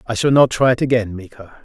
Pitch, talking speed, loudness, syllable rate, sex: 115 Hz, 255 wpm, -15 LUFS, 6.4 syllables/s, male